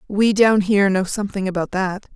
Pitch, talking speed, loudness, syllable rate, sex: 195 Hz, 195 wpm, -18 LUFS, 5.6 syllables/s, female